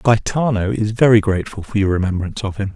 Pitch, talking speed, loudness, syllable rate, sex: 105 Hz, 195 wpm, -18 LUFS, 6.4 syllables/s, male